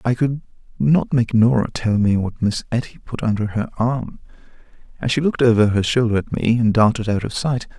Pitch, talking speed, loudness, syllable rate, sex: 115 Hz, 210 wpm, -19 LUFS, 5.5 syllables/s, male